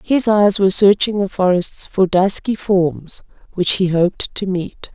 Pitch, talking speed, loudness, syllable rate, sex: 190 Hz, 170 wpm, -16 LUFS, 4.2 syllables/s, female